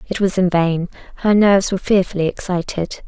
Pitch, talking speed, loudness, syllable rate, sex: 185 Hz, 155 wpm, -17 LUFS, 5.8 syllables/s, female